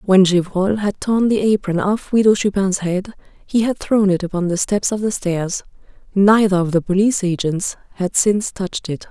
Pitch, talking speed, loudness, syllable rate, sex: 195 Hz, 190 wpm, -18 LUFS, 5.0 syllables/s, female